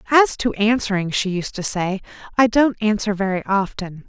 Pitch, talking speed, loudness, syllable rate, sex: 210 Hz, 175 wpm, -20 LUFS, 5.0 syllables/s, female